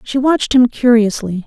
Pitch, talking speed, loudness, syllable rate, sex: 240 Hz, 165 wpm, -13 LUFS, 5.1 syllables/s, female